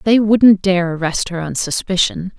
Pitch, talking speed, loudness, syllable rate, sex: 190 Hz, 175 wpm, -15 LUFS, 4.3 syllables/s, female